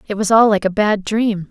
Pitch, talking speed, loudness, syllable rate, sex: 210 Hz, 280 wpm, -15 LUFS, 5.1 syllables/s, female